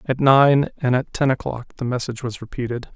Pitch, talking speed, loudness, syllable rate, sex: 130 Hz, 205 wpm, -20 LUFS, 5.8 syllables/s, male